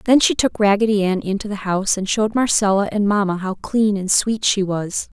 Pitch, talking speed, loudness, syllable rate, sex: 205 Hz, 220 wpm, -18 LUFS, 5.4 syllables/s, female